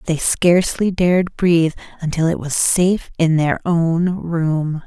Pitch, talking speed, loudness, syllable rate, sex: 170 Hz, 150 wpm, -17 LUFS, 4.2 syllables/s, female